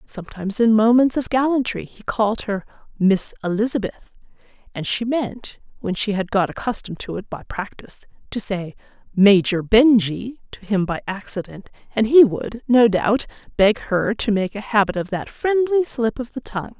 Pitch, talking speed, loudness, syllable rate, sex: 220 Hz, 170 wpm, -20 LUFS, 5.0 syllables/s, female